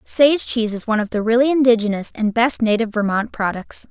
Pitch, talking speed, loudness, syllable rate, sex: 225 Hz, 200 wpm, -18 LUFS, 6.1 syllables/s, female